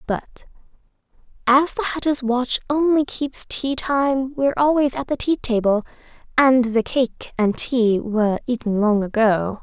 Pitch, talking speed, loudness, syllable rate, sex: 250 Hz, 150 wpm, -20 LUFS, 4.2 syllables/s, female